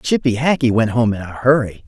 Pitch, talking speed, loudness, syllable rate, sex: 120 Hz, 225 wpm, -17 LUFS, 5.5 syllables/s, male